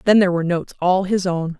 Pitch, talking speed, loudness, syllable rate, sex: 180 Hz, 265 wpm, -19 LUFS, 7.1 syllables/s, female